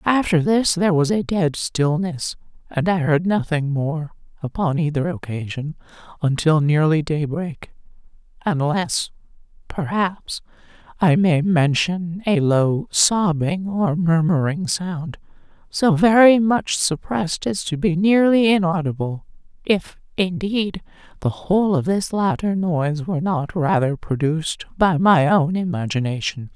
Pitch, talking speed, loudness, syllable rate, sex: 170 Hz, 120 wpm, -20 LUFS, 4.1 syllables/s, female